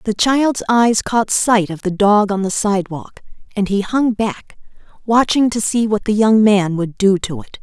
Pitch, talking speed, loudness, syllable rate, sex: 210 Hz, 205 wpm, -16 LUFS, 4.4 syllables/s, female